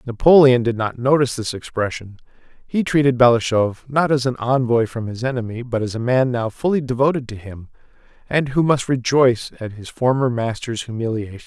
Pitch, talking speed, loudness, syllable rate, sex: 125 Hz, 180 wpm, -19 LUFS, 5.6 syllables/s, male